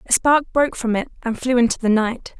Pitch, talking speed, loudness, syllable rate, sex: 240 Hz, 250 wpm, -19 LUFS, 5.7 syllables/s, female